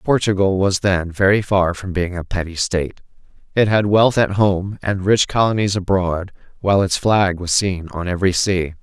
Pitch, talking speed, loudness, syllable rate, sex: 95 Hz, 185 wpm, -18 LUFS, 4.8 syllables/s, male